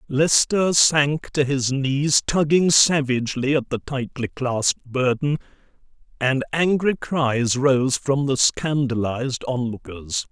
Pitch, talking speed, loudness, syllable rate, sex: 135 Hz, 115 wpm, -20 LUFS, 3.7 syllables/s, male